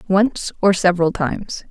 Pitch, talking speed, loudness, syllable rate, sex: 190 Hz, 140 wpm, -18 LUFS, 4.8 syllables/s, female